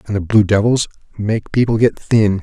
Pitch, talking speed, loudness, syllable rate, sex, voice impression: 105 Hz, 200 wpm, -16 LUFS, 5.1 syllables/s, male, masculine, middle-aged, powerful, bright, clear, mature, lively